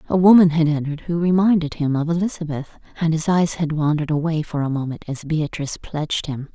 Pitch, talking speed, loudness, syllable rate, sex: 160 Hz, 200 wpm, -20 LUFS, 6.1 syllables/s, female